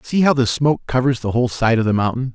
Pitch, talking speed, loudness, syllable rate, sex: 125 Hz, 280 wpm, -18 LUFS, 6.8 syllables/s, male